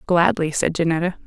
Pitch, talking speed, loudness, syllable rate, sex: 170 Hz, 145 wpm, -20 LUFS, 5.6 syllables/s, female